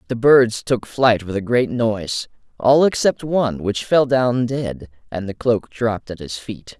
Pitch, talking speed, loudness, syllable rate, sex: 115 Hz, 195 wpm, -19 LUFS, 4.3 syllables/s, male